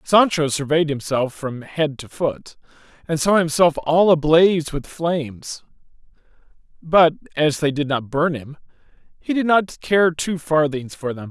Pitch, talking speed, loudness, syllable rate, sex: 155 Hz, 155 wpm, -19 LUFS, 4.2 syllables/s, male